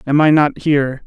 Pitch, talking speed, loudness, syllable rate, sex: 145 Hz, 225 wpm, -14 LUFS, 5.4 syllables/s, male